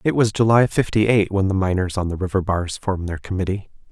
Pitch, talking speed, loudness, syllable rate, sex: 100 Hz, 230 wpm, -20 LUFS, 6.1 syllables/s, male